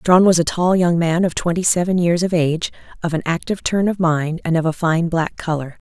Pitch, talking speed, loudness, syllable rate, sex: 170 Hz, 245 wpm, -18 LUFS, 5.6 syllables/s, female